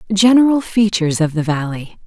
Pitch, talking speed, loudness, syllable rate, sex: 190 Hz, 145 wpm, -15 LUFS, 5.6 syllables/s, female